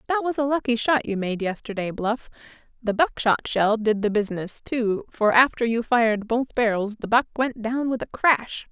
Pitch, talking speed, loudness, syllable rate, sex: 235 Hz, 200 wpm, -23 LUFS, 4.9 syllables/s, female